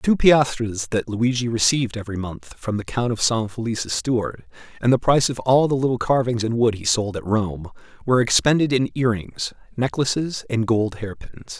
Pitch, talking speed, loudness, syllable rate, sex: 115 Hz, 195 wpm, -21 LUFS, 5.4 syllables/s, male